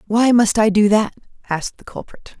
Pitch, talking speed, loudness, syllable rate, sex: 215 Hz, 200 wpm, -16 LUFS, 5.4 syllables/s, female